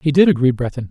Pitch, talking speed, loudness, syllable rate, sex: 140 Hz, 265 wpm, -16 LUFS, 6.9 syllables/s, male